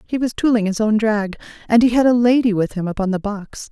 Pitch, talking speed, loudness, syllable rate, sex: 220 Hz, 260 wpm, -17 LUFS, 5.8 syllables/s, female